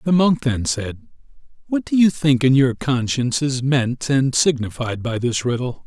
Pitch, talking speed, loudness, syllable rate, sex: 135 Hz, 185 wpm, -19 LUFS, 4.5 syllables/s, male